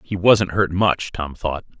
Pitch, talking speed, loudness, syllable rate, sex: 90 Hz, 200 wpm, -19 LUFS, 3.9 syllables/s, male